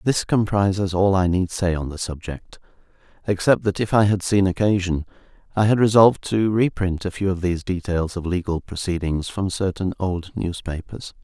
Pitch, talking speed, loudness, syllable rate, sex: 95 Hz, 175 wpm, -21 LUFS, 5.1 syllables/s, male